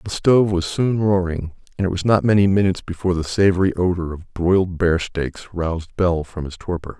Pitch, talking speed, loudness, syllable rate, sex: 90 Hz, 205 wpm, -20 LUFS, 5.6 syllables/s, male